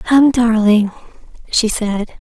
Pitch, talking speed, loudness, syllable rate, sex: 225 Hz, 105 wpm, -15 LUFS, 3.2 syllables/s, female